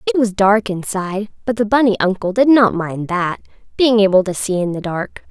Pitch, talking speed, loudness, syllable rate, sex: 205 Hz, 215 wpm, -16 LUFS, 5.4 syllables/s, female